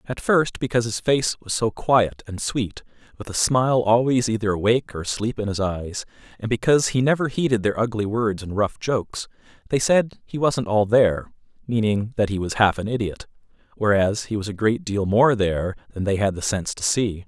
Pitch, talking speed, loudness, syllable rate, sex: 110 Hz, 210 wpm, -22 LUFS, 5.4 syllables/s, male